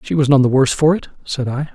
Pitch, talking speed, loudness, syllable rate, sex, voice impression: 140 Hz, 310 wpm, -16 LUFS, 6.9 syllables/s, male, very masculine, adult-like, slightly middle-aged, thick, relaxed, weak, very dark, slightly hard, muffled, slightly fluent, intellectual, sincere, very calm, slightly friendly, reassuring, slightly unique, elegant, sweet, kind, very modest, slightly light